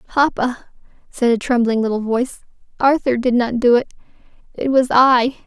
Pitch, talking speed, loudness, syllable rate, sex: 245 Hz, 155 wpm, -17 LUFS, 5.2 syllables/s, female